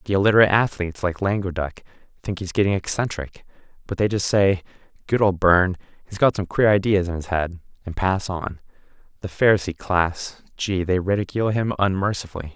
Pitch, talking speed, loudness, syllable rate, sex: 95 Hz, 160 wpm, -21 LUFS, 5.8 syllables/s, male